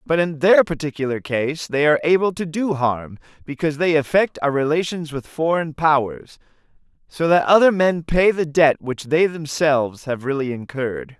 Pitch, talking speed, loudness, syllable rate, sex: 150 Hz, 170 wpm, -19 LUFS, 5.0 syllables/s, male